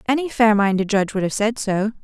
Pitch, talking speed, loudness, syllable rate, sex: 215 Hz, 235 wpm, -19 LUFS, 6.2 syllables/s, female